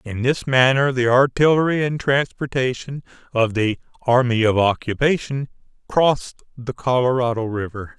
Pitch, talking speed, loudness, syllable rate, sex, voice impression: 125 Hz, 120 wpm, -19 LUFS, 4.7 syllables/s, male, very masculine, very adult-like, middle-aged, very thick, tensed, powerful, slightly bright, soft, slightly muffled, fluent, slightly raspy, cool, very intellectual, slightly refreshing, sincere, very calm, very mature, very friendly, reassuring, unique, very elegant, slightly sweet, lively, very kind